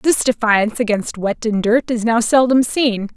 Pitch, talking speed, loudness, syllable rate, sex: 230 Hz, 190 wpm, -16 LUFS, 4.6 syllables/s, female